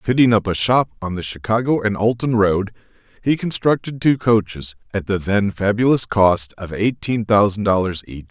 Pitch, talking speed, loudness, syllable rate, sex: 105 Hz, 175 wpm, -18 LUFS, 4.8 syllables/s, male